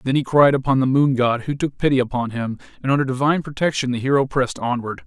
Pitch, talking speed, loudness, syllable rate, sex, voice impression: 130 Hz, 235 wpm, -20 LUFS, 6.6 syllables/s, male, masculine, adult-like, slightly thick, fluent, cool, slightly calm, slightly wild